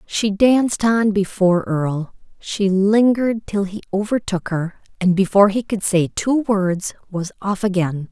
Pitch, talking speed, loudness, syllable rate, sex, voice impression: 200 Hz, 155 wpm, -18 LUFS, 4.5 syllables/s, female, very feminine, slightly young, very thin, slightly tensed, slightly powerful, bright, slightly soft, very clear, very fluent, very cute, very intellectual, refreshing, very sincere, calm, very friendly, very reassuring, unique, very elegant, slightly wild, very sweet, lively, very kind, slightly sharp